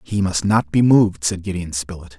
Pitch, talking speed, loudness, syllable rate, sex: 95 Hz, 220 wpm, -18 LUFS, 5.3 syllables/s, male